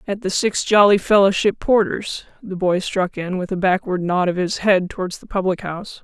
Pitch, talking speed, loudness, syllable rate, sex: 190 Hz, 210 wpm, -19 LUFS, 5.0 syllables/s, female